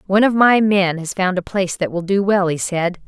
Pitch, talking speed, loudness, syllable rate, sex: 190 Hz, 275 wpm, -17 LUFS, 5.6 syllables/s, female